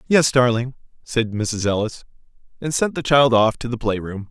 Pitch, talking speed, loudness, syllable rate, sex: 120 Hz, 195 wpm, -20 LUFS, 4.8 syllables/s, male